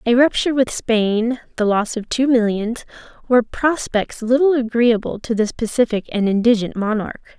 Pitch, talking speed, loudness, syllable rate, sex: 230 Hz, 155 wpm, -18 LUFS, 4.8 syllables/s, female